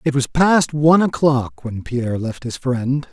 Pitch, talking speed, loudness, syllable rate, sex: 135 Hz, 190 wpm, -18 LUFS, 4.3 syllables/s, male